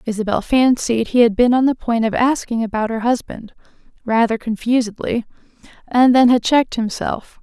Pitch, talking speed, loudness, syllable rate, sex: 235 Hz, 145 wpm, -17 LUFS, 5.1 syllables/s, female